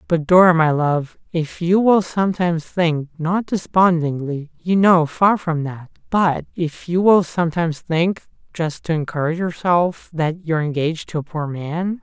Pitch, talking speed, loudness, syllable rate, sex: 165 Hz, 150 wpm, -19 LUFS, 4.7 syllables/s, male